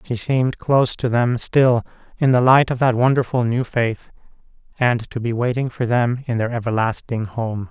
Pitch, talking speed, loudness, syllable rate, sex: 120 Hz, 185 wpm, -19 LUFS, 4.9 syllables/s, male